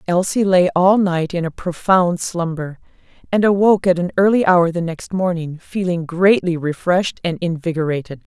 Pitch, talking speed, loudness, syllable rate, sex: 175 Hz, 160 wpm, -17 LUFS, 5.0 syllables/s, female